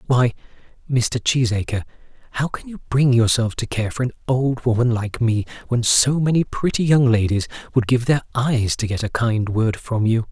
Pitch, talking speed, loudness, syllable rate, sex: 120 Hz, 190 wpm, -20 LUFS, 4.9 syllables/s, male